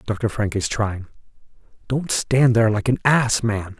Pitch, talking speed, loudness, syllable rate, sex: 115 Hz, 175 wpm, -20 LUFS, 4.3 syllables/s, male